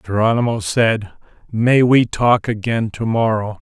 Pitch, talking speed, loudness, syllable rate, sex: 110 Hz, 115 wpm, -17 LUFS, 4.2 syllables/s, male